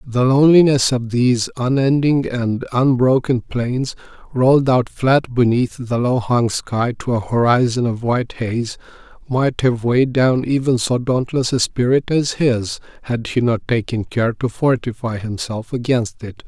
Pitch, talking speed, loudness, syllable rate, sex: 125 Hz, 155 wpm, -18 LUFS, 4.3 syllables/s, male